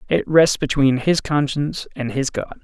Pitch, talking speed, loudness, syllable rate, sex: 145 Hz, 185 wpm, -19 LUFS, 4.8 syllables/s, male